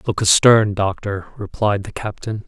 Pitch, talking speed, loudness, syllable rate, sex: 100 Hz, 145 wpm, -18 LUFS, 4.4 syllables/s, male